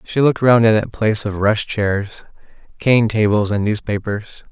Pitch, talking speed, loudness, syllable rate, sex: 110 Hz, 160 wpm, -17 LUFS, 4.4 syllables/s, male